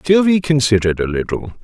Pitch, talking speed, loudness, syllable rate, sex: 130 Hz, 145 wpm, -16 LUFS, 6.3 syllables/s, male